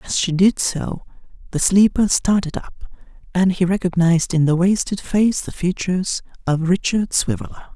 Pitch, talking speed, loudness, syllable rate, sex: 180 Hz, 155 wpm, -19 LUFS, 5.0 syllables/s, male